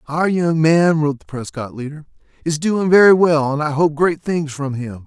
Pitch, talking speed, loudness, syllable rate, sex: 155 Hz, 215 wpm, -17 LUFS, 4.8 syllables/s, male